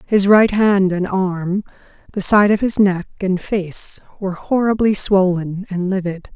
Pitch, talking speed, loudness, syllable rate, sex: 195 Hz, 160 wpm, -17 LUFS, 4.1 syllables/s, female